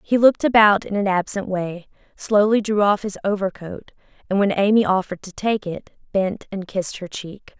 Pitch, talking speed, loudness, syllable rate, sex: 200 Hz, 190 wpm, -20 LUFS, 5.2 syllables/s, female